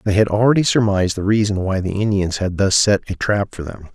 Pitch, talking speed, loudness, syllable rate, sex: 100 Hz, 245 wpm, -17 LUFS, 5.9 syllables/s, male